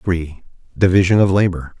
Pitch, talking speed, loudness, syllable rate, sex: 90 Hz, 135 wpm, -16 LUFS, 5.1 syllables/s, male